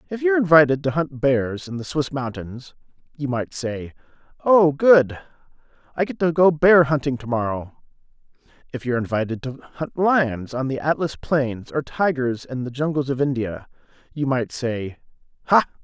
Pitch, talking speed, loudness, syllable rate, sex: 140 Hz, 165 wpm, -21 LUFS, 4.8 syllables/s, male